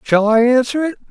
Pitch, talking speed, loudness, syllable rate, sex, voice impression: 250 Hz, 215 wpm, -14 LUFS, 5.6 syllables/s, male, masculine, slightly old, relaxed, slightly weak, slightly hard, muffled, slightly raspy, slightly sincere, mature, reassuring, wild, strict